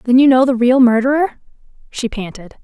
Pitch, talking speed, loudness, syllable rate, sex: 250 Hz, 180 wpm, -14 LUFS, 5.7 syllables/s, female